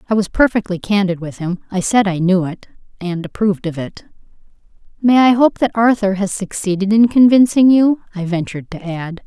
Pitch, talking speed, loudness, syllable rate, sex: 200 Hz, 180 wpm, -15 LUFS, 5.4 syllables/s, female